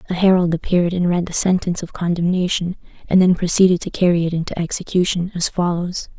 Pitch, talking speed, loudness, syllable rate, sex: 175 Hz, 185 wpm, -18 LUFS, 6.3 syllables/s, female